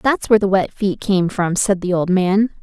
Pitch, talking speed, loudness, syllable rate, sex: 195 Hz, 250 wpm, -17 LUFS, 4.8 syllables/s, female